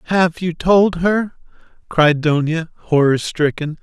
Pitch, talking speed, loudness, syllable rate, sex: 165 Hz, 125 wpm, -17 LUFS, 3.8 syllables/s, male